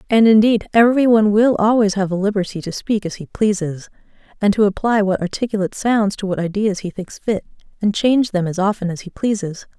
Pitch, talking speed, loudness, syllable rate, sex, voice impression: 205 Hz, 210 wpm, -18 LUFS, 5.9 syllables/s, female, feminine, adult-like, slightly clear, slightly fluent, sincere, slightly calm